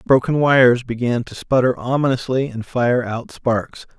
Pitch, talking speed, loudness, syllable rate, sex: 125 Hz, 150 wpm, -18 LUFS, 4.5 syllables/s, male